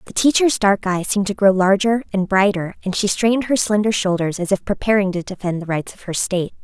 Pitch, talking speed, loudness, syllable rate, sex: 195 Hz, 235 wpm, -18 LUFS, 6.1 syllables/s, female